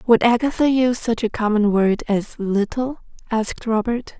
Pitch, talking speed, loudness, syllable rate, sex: 225 Hz, 160 wpm, -20 LUFS, 4.8 syllables/s, female